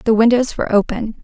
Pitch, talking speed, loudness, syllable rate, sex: 225 Hz, 195 wpm, -16 LUFS, 6.9 syllables/s, female